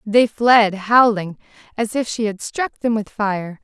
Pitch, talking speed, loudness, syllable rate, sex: 220 Hz, 180 wpm, -18 LUFS, 3.8 syllables/s, female